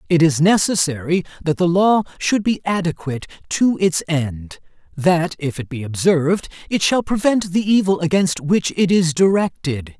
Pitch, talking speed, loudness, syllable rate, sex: 170 Hz, 160 wpm, -18 LUFS, 4.7 syllables/s, male